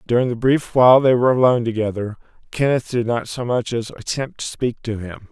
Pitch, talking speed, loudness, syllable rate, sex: 120 Hz, 215 wpm, -19 LUFS, 5.8 syllables/s, male